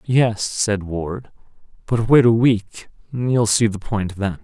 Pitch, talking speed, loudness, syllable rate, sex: 110 Hz, 150 wpm, -19 LUFS, 3.4 syllables/s, male